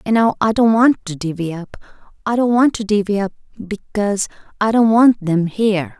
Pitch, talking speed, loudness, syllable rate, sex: 205 Hz, 190 wpm, -16 LUFS, 5.1 syllables/s, female